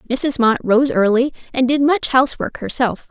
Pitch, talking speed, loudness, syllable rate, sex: 255 Hz, 175 wpm, -17 LUFS, 4.9 syllables/s, female